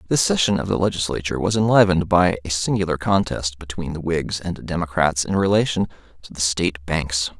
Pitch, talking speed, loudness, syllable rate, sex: 85 Hz, 180 wpm, -20 LUFS, 5.8 syllables/s, male